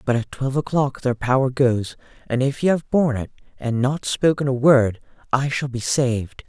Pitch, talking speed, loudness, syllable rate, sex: 130 Hz, 205 wpm, -21 LUFS, 5.1 syllables/s, male